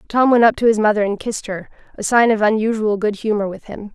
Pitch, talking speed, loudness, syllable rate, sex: 215 Hz, 260 wpm, -17 LUFS, 6.2 syllables/s, female